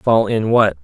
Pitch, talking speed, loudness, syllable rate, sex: 105 Hz, 215 wpm, -16 LUFS, 4.0 syllables/s, male